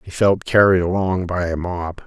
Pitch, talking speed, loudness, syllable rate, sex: 90 Hz, 205 wpm, -18 LUFS, 4.6 syllables/s, male